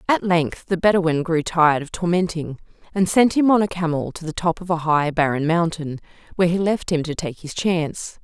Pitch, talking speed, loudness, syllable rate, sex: 170 Hz, 220 wpm, -20 LUFS, 5.3 syllables/s, female